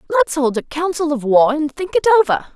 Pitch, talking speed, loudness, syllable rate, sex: 305 Hz, 235 wpm, -16 LUFS, 5.4 syllables/s, female